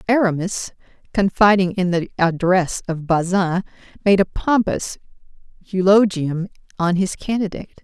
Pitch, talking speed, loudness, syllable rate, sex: 185 Hz, 105 wpm, -19 LUFS, 4.6 syllables/s, female